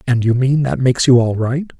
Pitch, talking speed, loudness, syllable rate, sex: 130 Hz, 265 wpm, -15 LUFS, 5.7 syllables/s, male